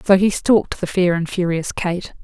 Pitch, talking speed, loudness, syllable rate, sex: 180 Hz, 215 wpm, -18 LUFS, 4.8 syllables/s, female